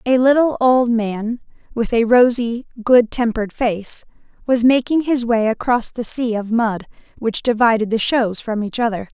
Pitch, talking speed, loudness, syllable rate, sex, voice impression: 235 Hz, 170 wpm, -17 LUFS, 4.5 syllables/s, female, feminine, adult-like, slightly tensed, powerful, fluent, slightly raspy, intellectual, calm, slightly reassuring, elegant, lively, slightly sharp